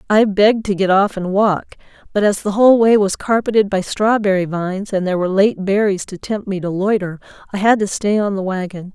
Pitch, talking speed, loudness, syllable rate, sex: 200 Hz, 230 wpm, -16 LUFS, 5.8 syllables/s, female